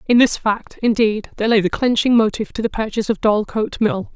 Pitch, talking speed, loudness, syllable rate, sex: 220 Hz, 215 wpm, -18 LUFS, 6.1 syllables/s, female